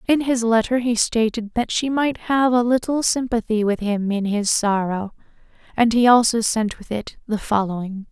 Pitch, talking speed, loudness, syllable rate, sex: 225 Hz, 185 wpm, -20 LUFS, 4.7 syllables/s, female